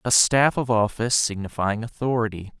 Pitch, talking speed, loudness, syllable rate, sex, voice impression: 115 Hz, 140 wpm, -22 LUFS, 5.3 syllables/s, male, masculine, adult-like, tensed, powerful, clear, fluent, cool, intellectual, friendly, reassuring, elegant, slightly wild, lively, slightly kind